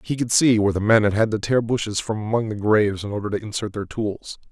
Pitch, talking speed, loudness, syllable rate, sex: 110 Hz, 280 wpm, -21 LUFS, 6.3 syllables/s, male